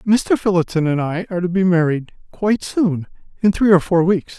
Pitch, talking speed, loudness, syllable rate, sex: 180 Hz, 190 wpm, -18 LUFS, 5.5 syllables/s, male